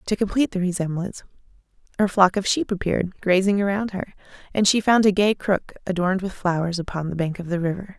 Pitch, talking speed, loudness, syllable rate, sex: 190 Hz, 205 wpm, -22 LUFS, 6.1 syllables/s, female